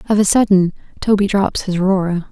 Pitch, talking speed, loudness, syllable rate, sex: 195 Hz, 180 wpm, -16 LUFS, 5.9 syllables/s, female